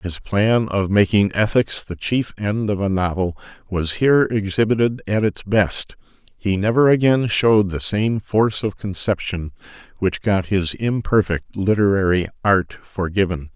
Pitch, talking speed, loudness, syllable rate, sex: 100 Hz, 145 wpm, -19 LUFS, 4.5 syllables/s, male